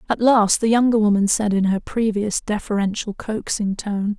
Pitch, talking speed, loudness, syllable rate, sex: 210 Hz, 170 wpm, -20 LUFS, 5.0 syllables/s, female